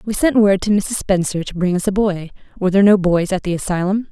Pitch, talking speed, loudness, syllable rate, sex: 195 Hz, 265 wpm, -17 LUFS, 6.2 syllables/s, female